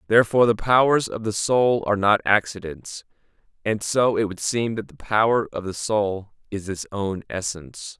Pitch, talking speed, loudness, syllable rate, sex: 105 Hz, 180 wpm, -22 LUFS, 5.0 syllables/s, male